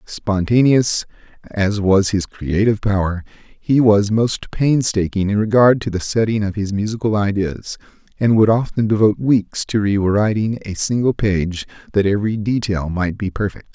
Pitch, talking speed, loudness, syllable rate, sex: 105 Hz, 155 wpm, -17 LUFS, 4.6 syllables/s, male